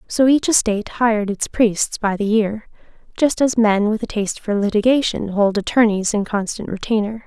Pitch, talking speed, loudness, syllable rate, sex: 215 Hz, 180 wpm, -18 LUFS, 5.1 syllables/s, female